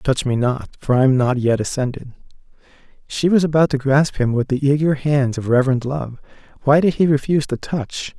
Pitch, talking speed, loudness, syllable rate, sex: 135 Hz, 205 wpm, -18 LUFS, 5.4 syllables/s, male